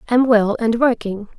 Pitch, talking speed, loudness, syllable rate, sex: 230 Hz, 175 wpm, -17 LUFS, 4.3 syllables/s, female